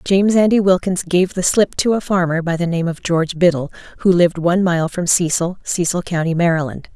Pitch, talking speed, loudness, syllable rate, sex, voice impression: 175 Hz, 205 wpm, -17 LUFS, 5.7 syllables/s, female, feminine, adult-like, slightly tensed, slightly powerful, soft, clear, slightly raspy, intellectual, calm, friendly, elegant, slightly lively, kind, modest